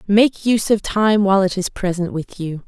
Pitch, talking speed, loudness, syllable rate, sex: 200 Hz, 225 wpm, -18 LUFS, 5.2 syllables/s, female